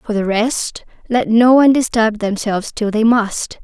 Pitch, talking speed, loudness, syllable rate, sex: 225 Hz, 165 wpm, -15 LUFS, 4.6 syllables/s, female